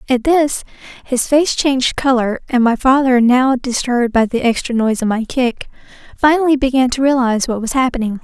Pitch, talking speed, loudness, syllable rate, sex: 250 Hz, 180 wpm, -15 LUFS, 5.5 syllables/s, female